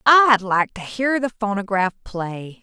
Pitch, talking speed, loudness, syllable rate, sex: 215 Hz, 160 wpm, -20 LUFS, 3.8 syllables/s, female